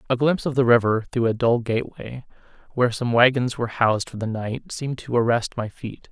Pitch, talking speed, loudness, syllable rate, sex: 120 Hz, 215 wpm, -22 LUFS, 6.0 syllables/s, male